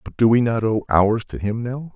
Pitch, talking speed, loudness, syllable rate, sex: 115 Hz, 275 wpm, -20 LUFS, 5.1 syllables/s, male